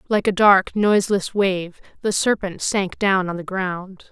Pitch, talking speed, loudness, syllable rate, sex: 190 Hz, 175 wpm, -20 LUFS, 4.1 syllables/s, female